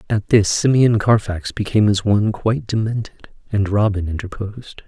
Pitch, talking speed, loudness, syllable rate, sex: 105 Hz, 150 wpm, -18 LUFS, 5.6 syllables/s, male